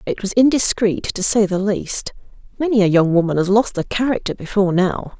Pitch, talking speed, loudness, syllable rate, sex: 200 Hz, 195 wpm, -17 LUFS, 5.6 syllables/s, female